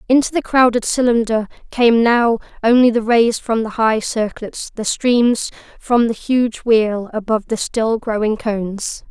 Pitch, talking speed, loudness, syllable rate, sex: 230 Hz, 160 wpm, -17 LUFS, 4.2 syllables/s, female